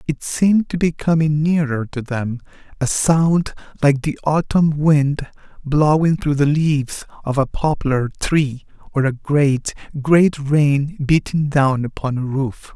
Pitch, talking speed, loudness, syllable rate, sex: 145 Hz, 145 wpm, -18 LUFS, 3.8 syllables/s, male